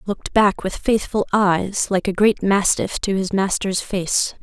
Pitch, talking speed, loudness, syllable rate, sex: 200 Hz, 175 wpm, -19 LUFS, 4.1 syllables/s, female